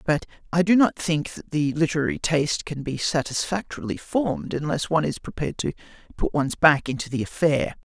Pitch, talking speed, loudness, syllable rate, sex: 150 Hz, 180 wpm, -24 LUFS, 5.9 syllables/s, male